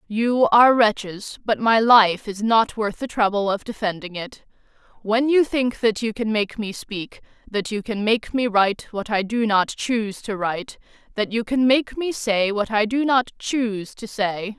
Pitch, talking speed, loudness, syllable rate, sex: 220 Hz, 200 wpm, -21 LUFS, 4.5 syllables/s, female